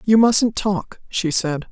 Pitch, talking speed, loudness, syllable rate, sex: 195 Hz, 175 wpm, -19 LUFS, 3.3 syllables/s, female